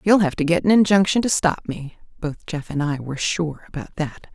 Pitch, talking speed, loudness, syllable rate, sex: 165 Hz, 235 wpm, -21 LUFS, 5.4 syllables/s, female